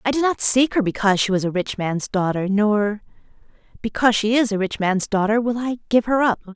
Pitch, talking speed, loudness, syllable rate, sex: 215 Hz, 210 wpm, -20 LUFS, 5.7 syllables/s, female